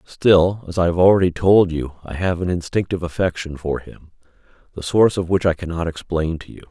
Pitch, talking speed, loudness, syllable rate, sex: 85 Hz, 205 wpm, -19 LUFS, 5.7 syllables/s, male